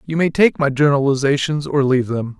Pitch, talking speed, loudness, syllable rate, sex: 140 Hz, 200 wpm, -17 LUFS, 6.1 syllables/s, male